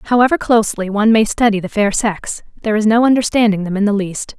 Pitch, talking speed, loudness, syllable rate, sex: 215 Hz, 220 wpm, -15 LUFS, 6.2 syllables/s, female